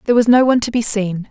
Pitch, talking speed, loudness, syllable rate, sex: 225 Hz, 320 wpm, -14 LUFS, 7.7 syllables/s, female